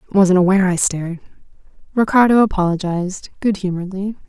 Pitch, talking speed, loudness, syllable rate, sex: 190 Hz, 110 wpm, -17 LUFS, 6.5 syllables/s, female